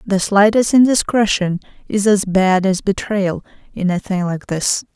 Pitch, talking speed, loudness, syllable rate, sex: 195 Hz, 155 wpm, -16 LUFS, 4.3 syllables/s, female